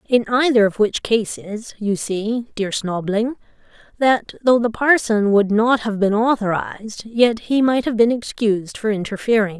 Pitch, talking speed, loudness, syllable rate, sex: 220 Hz, 165 wpm, -18 LUFS, 4.5 syllables/s, female